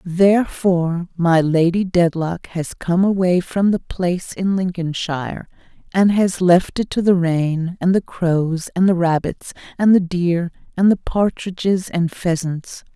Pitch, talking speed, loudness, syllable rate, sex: 180 Hz, 155 wpm, -18 LUFS, 4.0 syllables/s, female